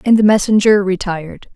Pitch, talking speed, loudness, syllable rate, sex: 200 Hz, 155 wpm, -13 LUFS, 5.6 syllables/s, female